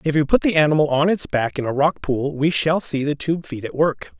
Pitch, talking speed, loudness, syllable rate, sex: 150 Hz, 285 wpm, -20 LUFS, 5.4 syllables/s, male